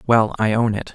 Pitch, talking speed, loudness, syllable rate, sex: 110 Hz, 255 wpm, -19 LUFS, 5.1 syllables/s, male